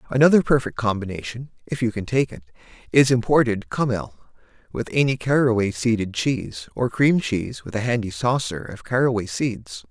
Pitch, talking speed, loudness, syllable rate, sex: 115 Hz, 155 wpm, -22 LUFS, 5.4 syllables/s, male